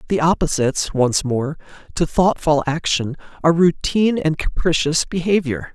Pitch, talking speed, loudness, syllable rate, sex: 160 Hz, 125 wpm, -19 LUFS, 4.9 syllables/s, male